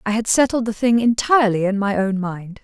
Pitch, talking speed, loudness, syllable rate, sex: 215 Hz, 230 wpm, -18 LUFS, 5.6 syllables/s, female